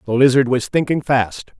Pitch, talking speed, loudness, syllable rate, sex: 130 Hz, 190 wpm, -17 LUFS, 5.0 syllables/s, male